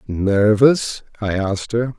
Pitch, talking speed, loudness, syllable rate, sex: 110 Hz, 120 wpm, -18 LUFS, 3.6 syllables/s, male